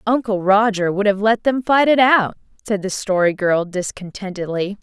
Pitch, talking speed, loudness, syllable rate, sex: 205 Hz, 175 wpm, -17 LUFS, 4.8 syllables/s, female